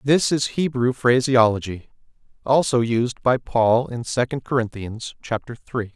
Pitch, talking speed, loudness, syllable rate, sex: 120 Hz, 130 wpm, -21 LUFS, 4.2 syllables/s, male